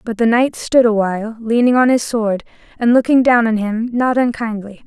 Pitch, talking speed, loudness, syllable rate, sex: 230 Hz, 210 wpm, -15 LUFS, 5.1 syllables/s, female